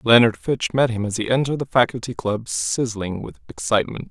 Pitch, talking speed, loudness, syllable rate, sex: 120 Hz, 190 wpm, -21 LUFS, 5.6 syllables/s, male